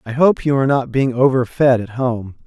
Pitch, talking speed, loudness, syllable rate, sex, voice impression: 130 Hz, 220 wpm, -16 LUFS, 5.3 syllables/s, male, masculine, adult-like, thick, tensed, powerful, slightly hard, clear, slightly nasal, cool, intellectual, slightly mature, wild, lively